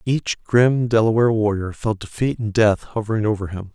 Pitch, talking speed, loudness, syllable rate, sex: 110 Hz, 175 wpm, -20 LUFS, 5.3 syllables/s, male